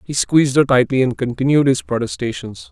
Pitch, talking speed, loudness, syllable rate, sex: 130 Hz, 175 wpm, -17 LUFS, 5.8 syllables/s, male